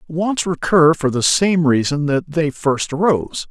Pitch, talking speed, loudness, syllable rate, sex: 155 Hz, 170 wpm, -17 LUFS, 4.2 syllables/s, male